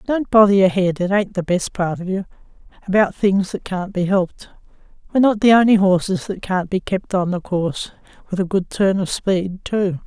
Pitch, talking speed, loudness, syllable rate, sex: 190 Hz, 195 wpm, -18 LUFS, 5.2 syllables/s, female